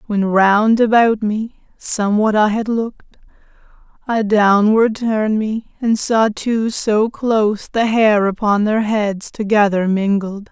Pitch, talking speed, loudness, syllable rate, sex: 215 Hz, 135 wpm, -16 LUFS, 3.9 syllables/s, female